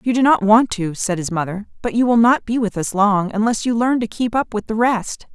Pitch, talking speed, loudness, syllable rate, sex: 220 Hz, 280 wpm, -18 LUFS, 5.4 syllables/s, female